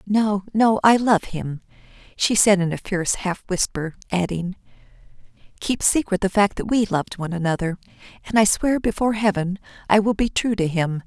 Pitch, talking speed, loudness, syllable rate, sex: 195 Hz, 180 wpm, -21 LUFS, 5.3 syllables/s, female